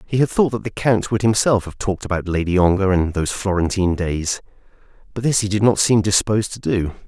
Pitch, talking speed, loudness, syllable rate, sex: 100 Hz, 220 wpm, -19 LUFS, 6.1 syllables/s, male